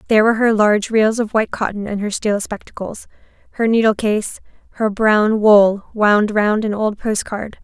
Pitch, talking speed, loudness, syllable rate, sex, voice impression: 215 Hz, 180 wpm, -16 LUFS, 5.0 syllables/s, female, feminine, slightly adult-like, fluent, slightly refreshing, slightly sincere, friendly